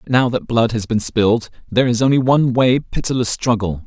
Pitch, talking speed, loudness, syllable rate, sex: 120 Hz, 200 wpm, -17 LUFS, 5.9 syllables/s, male